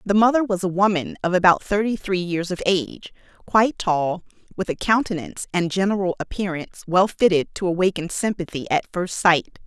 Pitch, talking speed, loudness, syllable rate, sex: 185 Hz, 175 wpm, -21 LUFS, 5.5 syllables/s, female